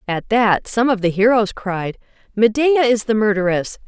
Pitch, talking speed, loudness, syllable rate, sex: 215 Hz, 170 wpm, -17 LUFS, 4.6 syllables/s, female